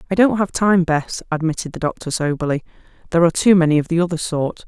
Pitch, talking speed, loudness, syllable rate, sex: 170 Hz, 220 wpm, -18 LUFS, 6.7 syllables/s, female